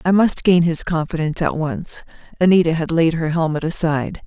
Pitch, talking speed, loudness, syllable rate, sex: 165 Hz, 185 wpm, -18 LUFS, 5.5 syllables/s, female